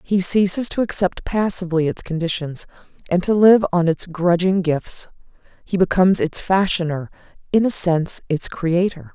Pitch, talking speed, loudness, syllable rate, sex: 180 Hz, 150 wpm, -19 LUFS, 4.9 syllables/s, female